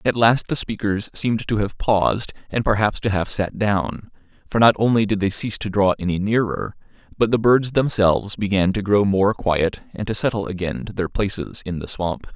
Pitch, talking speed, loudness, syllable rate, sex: 100 Hz, 210 wpm, -21 LUFS, 5.2 syllables/s, male